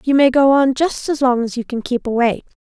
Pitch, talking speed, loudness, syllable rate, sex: 260 Hz, 275 wpm, -16 LUFS, 5.9 syllables/s, female